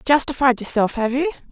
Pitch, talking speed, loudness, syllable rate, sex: 260 Hz, 160 wpm, -19 LUFS, 5.7 syllables/s, female